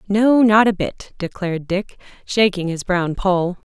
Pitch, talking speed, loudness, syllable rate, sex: 190 Hz, 160 wpm, -18 LUFS, 4.2 syllables/s, female